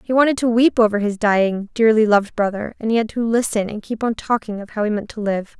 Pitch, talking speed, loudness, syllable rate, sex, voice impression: 220 Hz, 270 wpm, -19 LUFS, 6.1 syllables/s, female, feminine, adult-like, tensed, powerful, bright, clear, fluent, intellectual, friendly, lively, intense